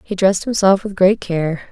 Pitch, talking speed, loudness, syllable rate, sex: 190 Hz, 210 wpm, -16 LUFS, 5.2 syllables/s, female